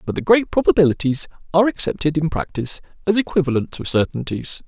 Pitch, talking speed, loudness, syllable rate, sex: 160 Hz, 155 wpm, -19 LUFS, 6.4 syllables/s, male